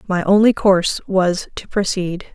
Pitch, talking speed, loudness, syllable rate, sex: 190 Hz, 155 wpm, -17 LUFS, 4.5 syllables/s, female